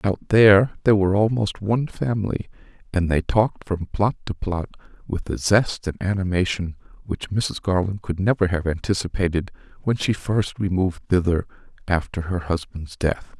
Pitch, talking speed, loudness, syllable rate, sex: 95 Hz, 155 wpm, -22 LUFS, 5.0 syllables/s, male